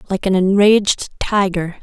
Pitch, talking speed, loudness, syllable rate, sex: 195 Hz, 130 wpm, -15 LUFS, 4.6 syllables/s, female